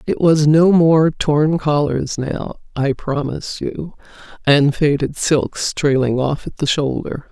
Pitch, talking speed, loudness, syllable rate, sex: 145 Hz, 150 wpm, -17 LUFS, 3.7 syllables/s, female